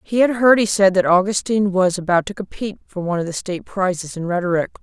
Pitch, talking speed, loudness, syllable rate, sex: 190 Hz, 235 wpm, -18 LUFS, 6.6 syllables/s, female